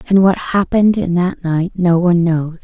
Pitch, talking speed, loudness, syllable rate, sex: 180 Hz, 205 wpm, -15 LUFS, 5.0 syllables/s, female